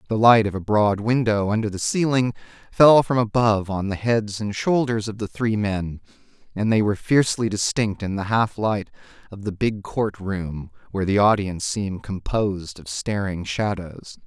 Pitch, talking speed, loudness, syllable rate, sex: 105 Hz, 180 wpm, -22 LUFS, 4.9 syllables/s, male